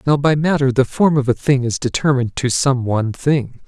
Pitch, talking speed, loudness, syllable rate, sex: 135 Hz, 230 wpm, -17 LUFS, 5.4 syllables/s, male